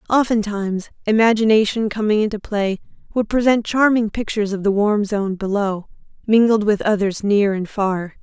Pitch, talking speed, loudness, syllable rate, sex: 210 Hz, 145 wpm, -18 LUFS, 5.1 syllables/s, female